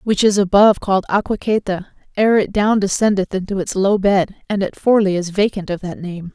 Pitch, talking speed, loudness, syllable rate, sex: 195 Hz, 200 wpm, -17 LUFS, 5.5 syllables/s, female